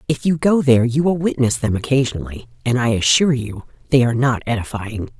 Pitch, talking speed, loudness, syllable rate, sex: 125 Hz, 195 wpm, -18 LUFS, 6.2 syllables/s, female